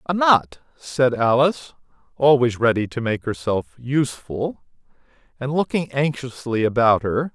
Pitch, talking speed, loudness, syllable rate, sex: 130 Hz, 120 wpm, -20 LUFS, 4.4 syllables/s, male